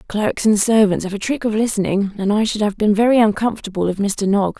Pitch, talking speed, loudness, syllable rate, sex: 210 Hz, 235 wpm, -17 LUFS, 5.9 syllables/s, female